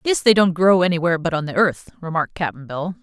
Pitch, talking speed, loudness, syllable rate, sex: 175 Hz, 240 wpm, -19 LUFS, 6.1 syllables/s, female